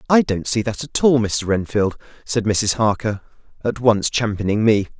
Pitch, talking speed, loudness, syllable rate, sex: 110 Hz, 180 wpm, -19 LUFS, 4.7 syllables/s, male